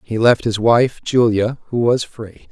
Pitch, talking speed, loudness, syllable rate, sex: 115 Hz, 190 wpm, -16 LUFS, 4.0 syllables/s, male